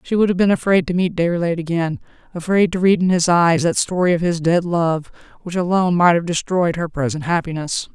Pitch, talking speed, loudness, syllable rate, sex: 170 Hz, 220 wpm, -18 LUFS, 5.9 syllables/s, female